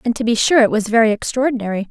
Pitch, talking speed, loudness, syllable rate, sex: 230 Hz, 250 wpm, -16 LUFS, 7.2 syllables/s, female